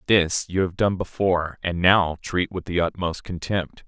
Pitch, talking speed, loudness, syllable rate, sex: 90 Hz, 185 wpm, -23 LUFS, 4.5 syllables/s, male